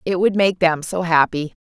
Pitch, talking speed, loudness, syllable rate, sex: 175 Hz, 220 wpm, -18 LUFS, 4.9 syllables/s, female